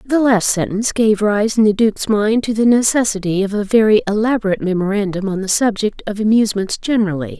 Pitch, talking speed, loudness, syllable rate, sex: 210 Hz, 185 wpm, -16 LUFS, 6.1 syllables/s, female